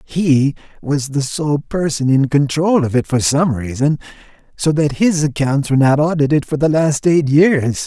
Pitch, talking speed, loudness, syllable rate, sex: 145 Hz, 185 wpm, -15 LUFS, 4.5 syllables/s, male